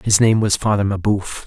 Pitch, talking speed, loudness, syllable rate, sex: 105 Hz, 205 wpm, -17 LUFS, 5.1 syllables/s, male